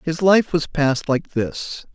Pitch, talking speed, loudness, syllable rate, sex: 160 Hz, 185 wpm, -19 LUFS, 4.0 syllables/s, male